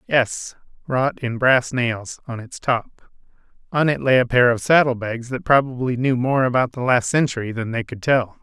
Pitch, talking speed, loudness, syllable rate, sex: 125 Hz, 200 wpm, -20 LUFS, 4.8 syllables/s, male